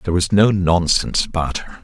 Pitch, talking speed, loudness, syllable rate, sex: 90 Hz, 195 wpm, -17 LUFS, 5.9 syllables/s, male